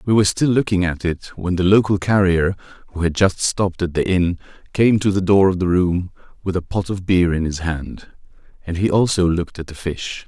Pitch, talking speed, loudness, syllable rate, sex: 90 Hz, 230 wpm, -19 LUFS, 5.4 syllables/s, male